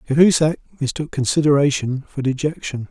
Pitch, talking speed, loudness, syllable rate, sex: 140 Hz, 105 wpm, -19 LUFS, 5.6 syllables/s, male